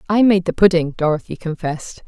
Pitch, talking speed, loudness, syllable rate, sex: 175 Hz, 175 wpm, -17 LUFS, 6.0 syllables/s, female